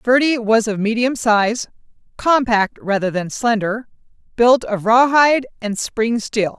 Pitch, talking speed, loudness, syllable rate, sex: 230 Hz, 135 wpm, -17 LUFS, 4.1 syllables/s, female